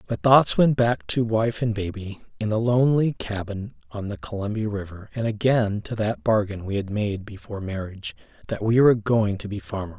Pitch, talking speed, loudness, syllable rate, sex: 105 Hz, 200 wpm, -23 LUFS, 5.4 syllables/s, male